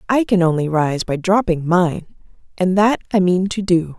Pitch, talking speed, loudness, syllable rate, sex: 180 Hz, 195 wpm, -17 LUFS, 4.7 syllables/s, female